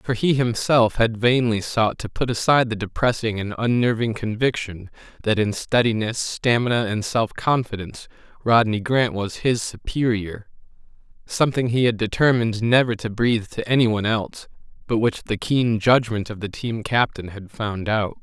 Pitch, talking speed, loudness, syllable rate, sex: 115 Hz, 160 wpm, -21 LUFS, 5.0 syllables/s, male